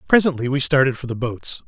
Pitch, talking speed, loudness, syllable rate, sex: 135 Hz, 215 wpm, -20 LUFS, 6.0 syllables/s, male